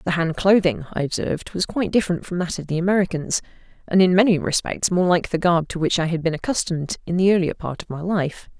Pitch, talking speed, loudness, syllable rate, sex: 175 Hz, 235 wpm, -21 LUFS, 6.3 syllables/s, female